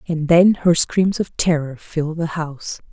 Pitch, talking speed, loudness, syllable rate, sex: 165 Hz, 185 wpm, -18 LUFS, 4.5 syllables/s, female